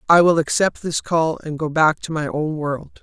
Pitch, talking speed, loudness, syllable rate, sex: 160 Hz, 240 wpm, -19 LUFS, 4.6 syllables/s, female